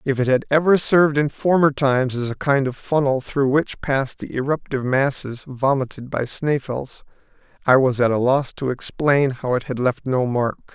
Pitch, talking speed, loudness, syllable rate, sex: 135 Hz, 195 wpm, -20 LUFS, 5.0 syllables/s, male